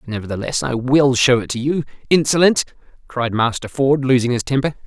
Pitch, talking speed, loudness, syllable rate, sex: 130 Hz, 175 wpm, -17 LUFS, 5.4 syllables/s, male